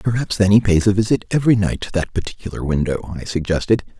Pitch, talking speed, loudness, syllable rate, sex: 100 Hz, 210 wpm, -19 LUFS, 6.6 syllables/s, male